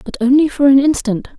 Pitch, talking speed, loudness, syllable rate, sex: 270 Hz, 215 wpm, -13 LUFS, 6.0 syllables/s, female